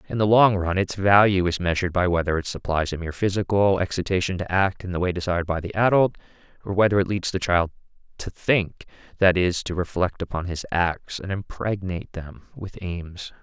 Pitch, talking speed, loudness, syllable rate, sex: 90 Hz, 195 wpm, -23 LUFS, 5.5 syllables/s, male